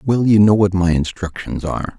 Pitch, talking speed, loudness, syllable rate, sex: 95 Hz, 210 wpm, -16 LUFS, 5.7 syllables/s, male